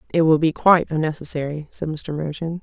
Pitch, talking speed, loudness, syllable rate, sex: 155 Hz, 185 wpm, -20 LUFS, 5.8 syllables/s, female